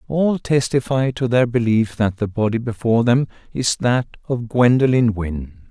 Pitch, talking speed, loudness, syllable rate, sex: 120 Hz, 160 wpm, -19 LUFS, 4.7 syllables/s, male